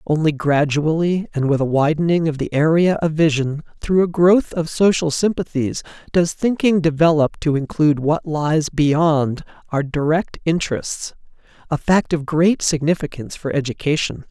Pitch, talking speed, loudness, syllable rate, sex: 155 Hz, 145 wpm, -18 LUFS, 4.7 syllables/s, male